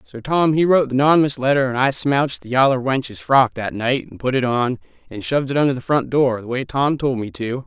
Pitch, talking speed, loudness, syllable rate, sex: 135 Hz, 260 wpm, -18 LUFS, 5.8 syllables/s, male